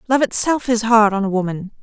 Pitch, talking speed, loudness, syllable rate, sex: 220 Hz, 230 wpm, -17 LUFS, 5.7 syllables/s, female